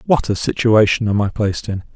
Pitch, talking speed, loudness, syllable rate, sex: 110 Hz, 215 wpm, -17 LUFS, 5.8 syllables/s, male